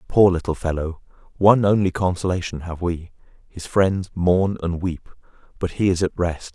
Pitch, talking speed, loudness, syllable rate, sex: 90 Hz, 165 wpm, -21 LUFS, 4.9 syllables/s, male